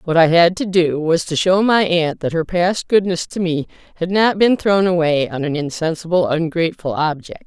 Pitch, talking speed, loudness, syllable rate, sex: 170 Hz, 210 wpm, -17 LUFS, 4.9 syllables/s, female